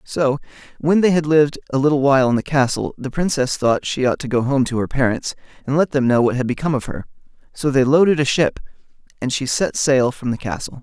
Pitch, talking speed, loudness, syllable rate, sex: 135 Hz, 240 wpm, -18 LUFS, 6.0 syllables/s, male